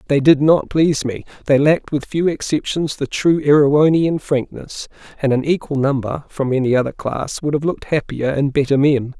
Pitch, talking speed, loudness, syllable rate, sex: 145 Hz, 190 wpm, -17 LUFS, 5.3 syllables/s, male